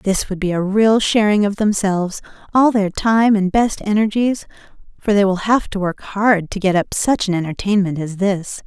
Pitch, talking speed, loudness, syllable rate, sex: 200 Hz, 200 wpm, -17 LUFS, 4.8 syllables/s, female